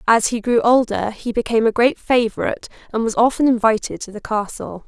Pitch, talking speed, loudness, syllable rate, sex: 230 Hz, 195 wpm, -18 LUFS, 5.8 syllables/s, female